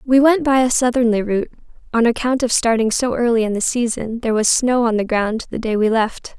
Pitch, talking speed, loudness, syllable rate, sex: 235 Hz, 235 wpm, -17 LUFS, 5.7 syllables/s, female